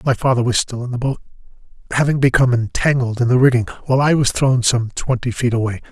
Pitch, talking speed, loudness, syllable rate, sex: 125 Hz, 215 wpm, -17 LUFS, 6.5 syllables/s, male